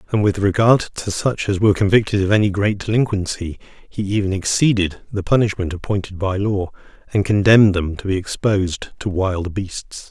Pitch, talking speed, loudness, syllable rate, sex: 100 Hz, 170 wpm, -18 LUFS, 5.3 syllables/s, male